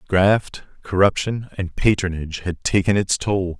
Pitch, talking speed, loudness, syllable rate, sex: 95 Hz, 135 wpm, -20 LUFS, 4.4 syllables/s, male